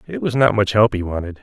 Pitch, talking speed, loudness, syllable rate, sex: 100 Hz, 295 wpm, -18 LUFS, 6.3 syllables/s, male